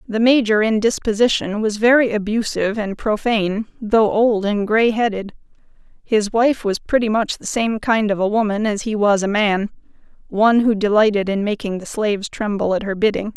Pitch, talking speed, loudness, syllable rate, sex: 215 Hz, 185 wpm, -18 LUFS, 5.2 syllables/s, female